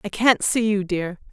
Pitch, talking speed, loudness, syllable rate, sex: 205 Hz, 225 wpm, -21 LUFS, 4.4 syllables/s, female